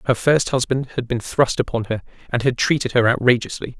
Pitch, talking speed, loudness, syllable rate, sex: 125 Hz, 205 wpm, -20 LUFS, 5.6 syllables/s, male